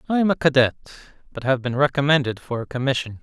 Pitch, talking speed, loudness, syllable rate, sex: 135 Hz, 205 wpm, -21 LUFS, 6.9 syllables/s, male